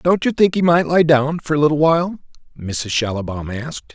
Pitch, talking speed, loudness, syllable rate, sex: 145 Hz, 215 wpm, -17 LUFS, 5.5 syllables/s, male